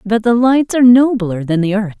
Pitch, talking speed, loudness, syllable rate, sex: 220 Hz, 240 wpm, -13 LUFS, 5.3 syllables/s, female